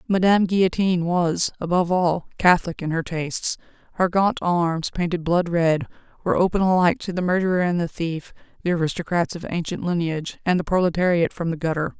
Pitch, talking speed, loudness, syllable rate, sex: 175 Hz, 175 wpm, -22 LUFS, 6.0 syllables/s, female